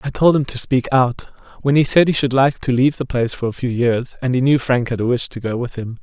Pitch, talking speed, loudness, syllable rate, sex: 130 Hz, 310 wpm, -18 LUFS, 6.0 syllables/s, male